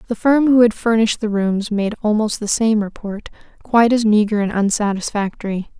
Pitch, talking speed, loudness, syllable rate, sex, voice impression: 215 Hz, 175 wpm, -17 LUFS, 5.4 syllables/s, female, very feminine, young, very thin, tensed, slightly weak, bright, soft, clear, fluent, slightly raspy, very cute, intellectual, very refreshing, sincere, calm, very friendly, very reassuring, unique, very elegant, slightly wild, very sweet, slightly lively, very kind, modest, light